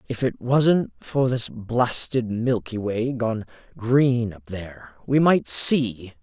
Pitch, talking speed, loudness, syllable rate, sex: 115 Hz, 145 wpm, -22 LUFS, 3.3 syllables/s, male